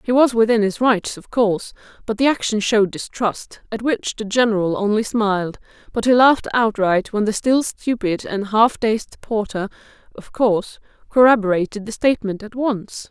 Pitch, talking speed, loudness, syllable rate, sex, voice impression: 220 Hz, 170 wpm, -19 LUFS, 5.0 syllables/s, female, very feminine, adult-like, slightly middle-aged, slightly thin, slightly relaxed, slightly weak, slightly dark, soft, clear, slightly fluent, slightly raspy, cute, very intellectual, refreshing, very sincere, very calm, friendly, very reassuring, very unique, elegant, very sweet, slightly lively, very kind, modest, light